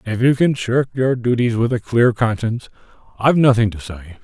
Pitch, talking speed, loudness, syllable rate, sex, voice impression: 120 Hz, 200 wpm, -17 LUFS, 5.7 syllables/s, male, masculine, middle-aged, thick, tensed, powerful, slightly muffled, raspy, slightly calm, mature, slightly friendly, wild, lively, slightly strict